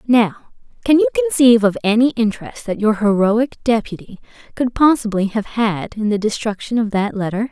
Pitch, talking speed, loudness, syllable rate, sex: 220 Hz, 170 wpm, -17 LUFS, 5.4 syllables/s, female